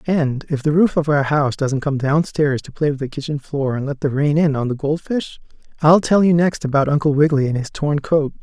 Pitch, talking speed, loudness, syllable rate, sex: 145 Hz, 265 wpm, -18 LUFS, 5.5 syllables/s, male